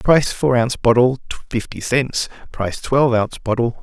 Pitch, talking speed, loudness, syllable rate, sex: 120 Hz, 125 wpm, -18 LUFS, 5.6 syllables/s, male